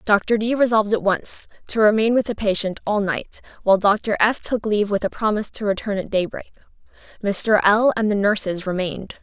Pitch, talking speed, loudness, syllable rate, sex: 210 Hz, 195 wpm, -20 LUFS, 5.7 syllables/s, female